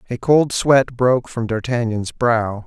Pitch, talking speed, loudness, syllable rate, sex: 120 Hz, 160 wpm, -18 LUFS, 4.1 syllables/s, male